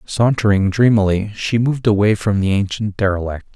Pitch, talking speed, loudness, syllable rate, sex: 105 Hz, 150 wpm, -17 LUFS, 5.4 syllables/s, male